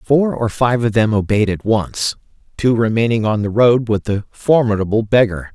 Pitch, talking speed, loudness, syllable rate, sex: 110 Hz, 185 wpm, -16 LUFS, 4.7 syllables/s, male